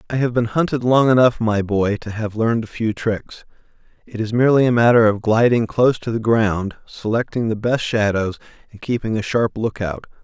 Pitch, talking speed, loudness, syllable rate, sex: 115 Hz, 200 wpm, -18 LUFS, 5.3 syllables/s, male